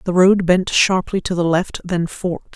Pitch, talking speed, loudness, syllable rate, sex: 180 Hz, 210 wpm, -17 LUFS, 4.7 syllables/s, female